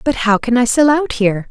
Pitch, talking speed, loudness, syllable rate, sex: 245 Hz, 280 wpm, -14 LUFS, 5.7 syllables/s, female